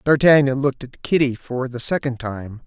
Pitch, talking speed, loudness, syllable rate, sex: 130 Hz, 180 wpm, -19 LUFS, 5.1 syllables/s, male